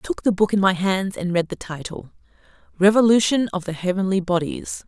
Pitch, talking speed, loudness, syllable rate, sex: 190 Hz, 195 wpm, -20 LUFS, 5.7 syllables/s, female